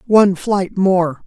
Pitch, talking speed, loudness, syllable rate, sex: 190 Hz, 140 wpm, -15 LUFS, 3.5 syllables/s, female